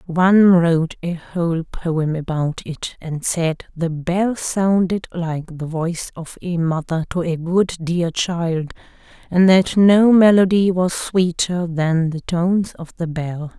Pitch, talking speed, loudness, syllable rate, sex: 170 Hz, 155 wpm, -18 LUFS, 3.7 syllables/s, female